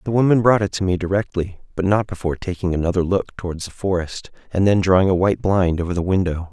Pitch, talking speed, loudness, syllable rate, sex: 95 Hz, 230 wpm, -20 LUFS, 6.4 syllables/s, male